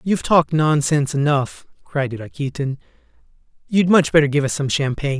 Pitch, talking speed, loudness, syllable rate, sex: 145 Hz, 150 wpm, -19 LUFS, 5.6 syllables/s, male